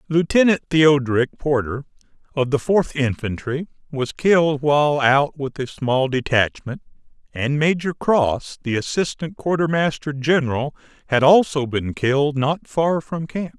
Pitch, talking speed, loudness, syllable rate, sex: 145 Hz, 135 wpm, -20 LUFS, 4.4 syllables/s, male